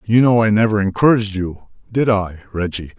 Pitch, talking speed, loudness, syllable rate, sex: 105 Hz, 160 wpm, -17 LUFS, 5.8 syllables/s, male